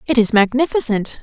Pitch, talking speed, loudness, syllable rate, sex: 240 Hz, 145 wpm, -16 LUFS, 5.6 syllables/s, female